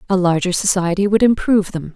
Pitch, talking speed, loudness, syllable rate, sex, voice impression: 190 Hz, 185 wpm, -16 LUFS, 6.2 syllables/s, female, feminine, adult-like, tensed, slightly powerful, clear, fluent, intellectual, calm, elegant, slightly strict